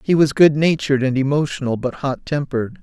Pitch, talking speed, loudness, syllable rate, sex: 140 Hz, 170 wpm, -18 LUFS, 5.9 syllables/s, male